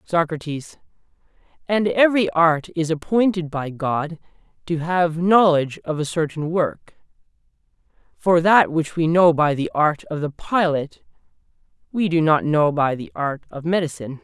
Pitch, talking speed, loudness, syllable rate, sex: 165 Hz, 150 wpm, -20 LUFS, 4.6 syllables/s, male